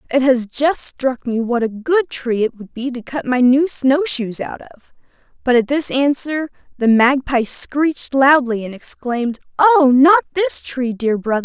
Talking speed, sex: 205 wpm, female